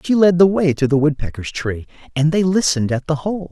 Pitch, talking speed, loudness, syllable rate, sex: 155 Hz, 240 wpm, -17 LUFS, 5.8 syllables/s, male